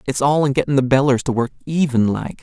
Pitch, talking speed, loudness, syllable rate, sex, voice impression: 135 Hz, 245 wpm, -18 LUFS, 6.0 syllables/s, male, very masculine, slightly middle-aged, thick, relaxed, slightly weak, slightly dark, slightly hard, slightly muffled, fluent, slightly raspy, very cool, very intellectual, slightly refreshing, sincere, very calm, very mature, friendly, reassuring, unique, slightly elegant, wild, sweet, slightly lively, slightly kind, slightly modest